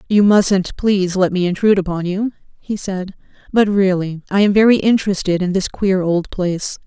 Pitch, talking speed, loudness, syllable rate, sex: 190 Hz, 185 wpm, -16 LUFS, 5.3 syllables/s, female